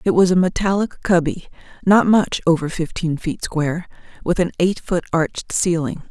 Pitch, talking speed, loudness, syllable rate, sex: 175 Hz, 165 wpm, -19 LUFS, 5.0 syllables/s, female